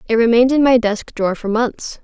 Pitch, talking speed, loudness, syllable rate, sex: 235 Hz, 235 wpm, -16 LUFS, 6.0 syllables/s, female